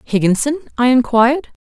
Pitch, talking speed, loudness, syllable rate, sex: 250 Hz, 110 wpm, -15 LUFS, 5.0 syllables/s, female